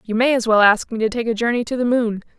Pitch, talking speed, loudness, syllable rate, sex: 230 Hz, 325 wpm, -18 LUFS, 6.6 syllables/s, female